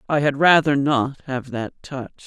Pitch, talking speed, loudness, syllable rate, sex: 140 Hz, 185 wpm, -19 LUFS, 5.0 syllables/s, female